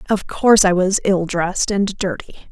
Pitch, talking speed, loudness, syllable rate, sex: 190 Hz, 190 wpm, -17 LUFS, 5.2 syllables/s, female